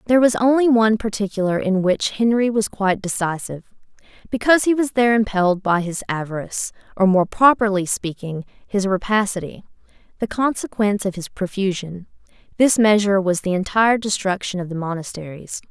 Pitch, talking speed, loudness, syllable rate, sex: 200 Hz, 150 wpm, -19 LUFS, 5.9 syllables/s, female